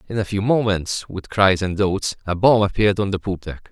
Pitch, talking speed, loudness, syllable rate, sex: 100 Hz, 240 wpm, -20 LUFS, 5.2 syllables/s, male